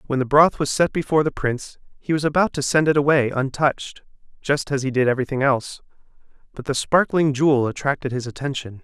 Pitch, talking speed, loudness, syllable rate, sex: 140 Hz, 195 wpm, -20 LUFS, 6.2 syllables/s, male